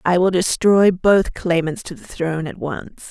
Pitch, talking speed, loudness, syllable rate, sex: 180 Hz, 195 wpm, -18 LUFS, 4.4 syllables/s, female